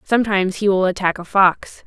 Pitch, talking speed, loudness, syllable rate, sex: 195 Hz, 195 wpm, -17 LUFS, 5.7 syllables/s, female